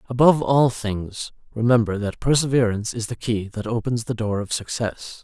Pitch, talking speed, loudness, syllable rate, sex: 115 Hz, 170 wpm, -22 LUFS, 5.2 syllables/s, male